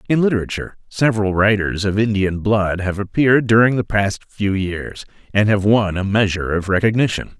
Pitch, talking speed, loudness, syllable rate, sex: 105 Hz, 170 wpm, -18 LUFS, 5.6 syllables/s, male